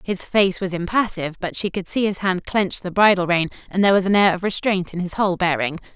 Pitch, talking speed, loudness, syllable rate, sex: 185 Hz, 250 wpm, -20 LUFS, 6.1 syllables/s, female